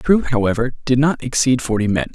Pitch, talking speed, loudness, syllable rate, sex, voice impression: 130 Hz, 225 wpm, -18 LUFS, 6.4 syllables/s, male, very masculine, slightly young, slightly thick, tensed, weak, slightly dark, slightly soft, clear, fluent, cool, very intellectual, very refreshing, sincere, calm, mature, very friendly, very reassuring, unique, very elegant, wild, sweet, lively, kind